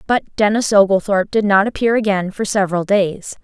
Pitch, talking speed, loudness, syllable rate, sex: 200 Hz, 175 wpm, -16 LUFS, 5.5 syllables/s, female